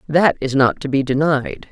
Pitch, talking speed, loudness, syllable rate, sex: 140 Hz, 210 wpm, -17 LUFS, 4.6 syllables/s, female